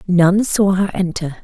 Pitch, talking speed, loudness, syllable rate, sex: 185 Hz, 165 wpm, -16 LUFS, 4.1 syllables/s, female